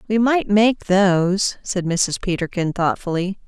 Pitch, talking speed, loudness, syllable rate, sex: 190 Hz, 140 wpm, -19 LUFS, 4.1 syllables/s, female